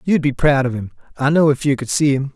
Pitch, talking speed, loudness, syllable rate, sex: 140 Hz, 305 wpm, -17 LUFS, 6.1 syllables/s, male